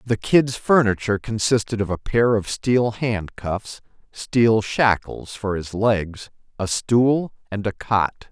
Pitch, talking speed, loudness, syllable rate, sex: 110 Hz, 150 wpm, -21 LUFS, 3.7 syllables/s, male